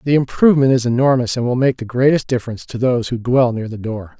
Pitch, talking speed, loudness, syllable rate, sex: 125 Hz, 245 wpm, -16 LUFS, 6.6 syllables/s, male